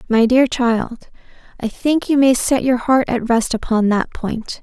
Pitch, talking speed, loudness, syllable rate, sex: 240 Hz, 195 wpm, -17 LUFS, 4.2 syllables/s, female